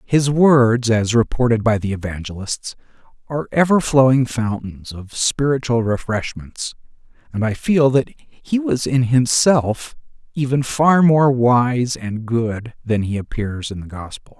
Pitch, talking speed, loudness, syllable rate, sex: 120 Hz, 140 wpm, -18 LUFS, 4.0 syllables/s, male